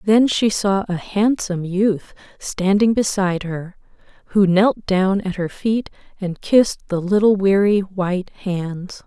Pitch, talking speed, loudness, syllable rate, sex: 195 Hz, 145 wpm, -19 LUFS, 4.0 syllables/s, female